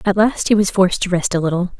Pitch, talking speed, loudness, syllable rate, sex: 190 Hz, 300 wpm, -17 LUFS, 6.6 syllables/s, female